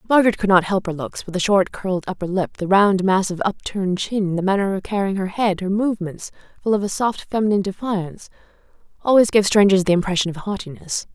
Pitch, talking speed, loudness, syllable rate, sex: 195 Hz, 210 wpm, -20 LUFS, 6.3 syllables/s, female